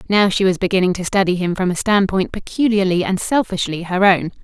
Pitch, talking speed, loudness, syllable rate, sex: 190 Hz, 205 wpm, -17 LUFS, 5.8 syllables/s, female